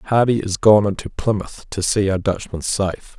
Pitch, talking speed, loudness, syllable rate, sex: 100 Hz, 190 wpm, -19 LUFS, 4.8 syllables/s, male